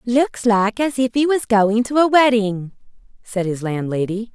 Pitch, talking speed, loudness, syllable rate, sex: 225 Hz, 180 wpm, -18 LUFS, 4.3 syllables/s, female